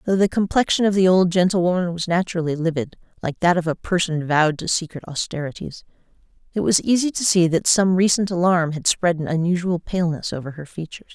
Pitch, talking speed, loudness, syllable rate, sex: 175 Hz, 195 wpm, -20 LUFS, 6.1 syllables/s, female